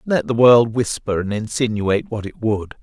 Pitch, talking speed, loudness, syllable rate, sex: 115 Hz, 190 wpm, -18 LUFS, 5.0 syllables/s, male